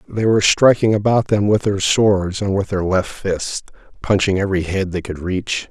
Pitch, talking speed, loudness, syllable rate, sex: 100 Hz, 200 wpm, -17 LUFS, 4.8 syllables/s, male